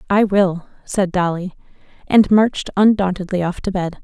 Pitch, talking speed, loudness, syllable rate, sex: 190 Hz, 150 wpm, -17 LUFS, 4.9 syllables/s, female